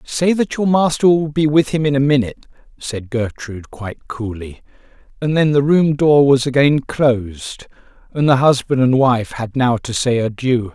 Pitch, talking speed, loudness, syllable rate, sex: 135 Hz, 185 wpm, -16 LUFS, 4.8 syllables/s, male